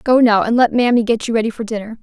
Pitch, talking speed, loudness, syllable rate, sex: 230 Hz, 295 wpm, -15 LUFS, 6.7 syllables/s, female